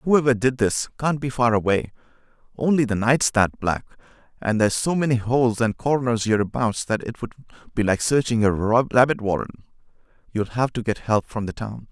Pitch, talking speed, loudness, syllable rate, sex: 115 Hz, 180 wpm, -22 LUFS, 5.4 syllables/s, male